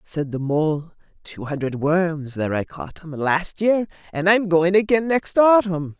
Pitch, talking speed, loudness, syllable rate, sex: 170 Hz, 170 wpm, -20 LUFS, 4.1 syllables/s, male